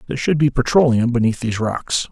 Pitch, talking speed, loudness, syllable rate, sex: 125 Hz, 200 wpm, -18 LUFS, 6.3 syllables/s, male